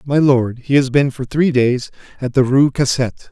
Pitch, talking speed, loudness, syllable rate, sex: 130 Hz, 215 wpm, -16 LUFS, 4.8 syllables/s, male